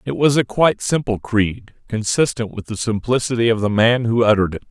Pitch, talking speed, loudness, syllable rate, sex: 115 Hz, 205 wpm, -18 LUFS, 5.6 syllables/s, male